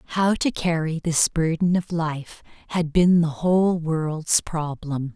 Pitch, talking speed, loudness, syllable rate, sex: 165 Hz, 150 wpm, -22 LUFS, 3.6 syllables/s, female